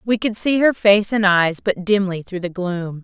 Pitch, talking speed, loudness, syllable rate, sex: 195 Hz, 235 wpm, -18 LUFS, 4.5 syllables/s, female